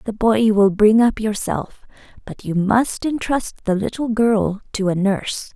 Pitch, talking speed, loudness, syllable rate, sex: 215 Hz, 185 wpm, -18 LUFS, 4.5 syllables/s, female